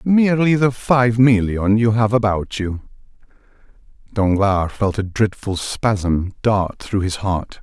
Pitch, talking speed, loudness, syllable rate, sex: 110 Hz, 135 wpm, -18 LUFS, 3.7 syllables/s, male